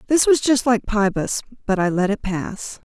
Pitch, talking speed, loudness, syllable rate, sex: 215 Hz, 185 wpm, -20 LUFS, 4.7 syllables/s, female